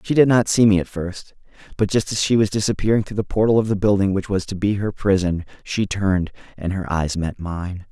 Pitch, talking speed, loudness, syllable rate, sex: 100 Hz, 245 wpm, -20 LUFS, 5.6 syllables/s, male